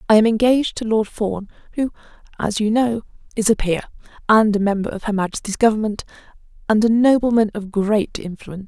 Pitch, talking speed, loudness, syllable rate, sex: 215 Hz, 180 wpm, -19 LUFS, 5.9 syllables/s, female